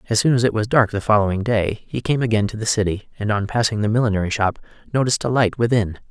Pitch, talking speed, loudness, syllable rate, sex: 110 Hz, 245 wpm, -20 LUFS, 6.6 syllables/s, male